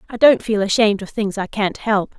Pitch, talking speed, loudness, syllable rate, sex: 210 Hz, 245 wpm, -18 LUFS, 5.5 syllables/s, female